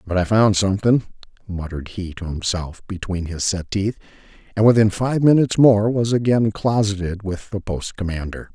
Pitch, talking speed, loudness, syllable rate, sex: 100 Hz, 170 wpm, -19 LUFS, 5.3 syllables/s, male